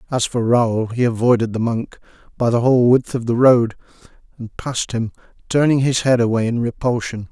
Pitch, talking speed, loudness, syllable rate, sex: 120 Hz, 190 wpm, -18 LUFS, 5.4 syllables/s, male